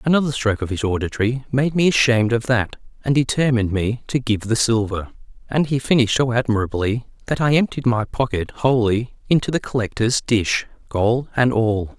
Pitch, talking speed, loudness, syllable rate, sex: 120 Hz, 175 wpm, -20 LUFS, 5.5 syllables/s, male